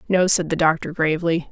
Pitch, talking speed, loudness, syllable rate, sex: 165 Hz, 195 wpm, -19 LUFS, 5.9 syllables/s, female